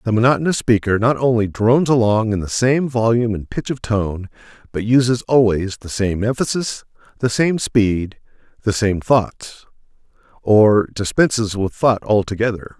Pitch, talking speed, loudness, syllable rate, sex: 110 Hz, 145 wpm, -17 LUFS, 4.8 syllables/s, male